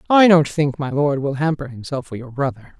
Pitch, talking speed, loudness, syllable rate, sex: 145 Hz, 235 wpm, -19 LUFS, 5.4 syllables/s, female